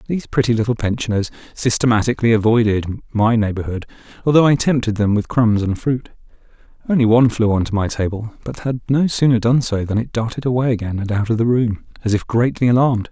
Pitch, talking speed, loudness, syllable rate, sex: 115 Hz, 190 wpm, -18 LUFS, 6.3 syllables/s, male